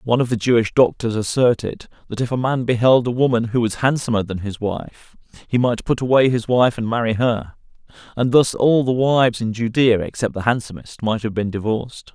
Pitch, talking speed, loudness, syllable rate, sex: 120 Hz, 205 wpm, -19 LUFS, 5.5 syllables/s, male